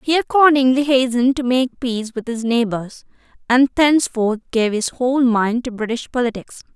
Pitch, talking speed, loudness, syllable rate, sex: 245 Hz, 160 wpm, -17 LUFS, 5.3 syllables/s, female